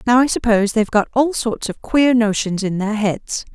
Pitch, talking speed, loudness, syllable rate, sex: 225 Hz, 220 wpm, -17 LUFS, 5.2 syllables/s, female